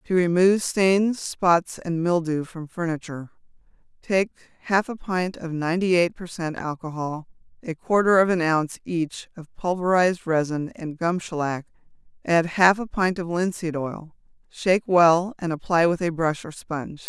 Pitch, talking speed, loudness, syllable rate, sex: 170 Hz, 160 wpm, -23 LUFS, 4.8 syllables/s, female